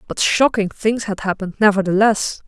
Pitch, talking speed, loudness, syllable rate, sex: 205 Hz, 145 wpm, -17 LUFS, 5.4 syllables/s, female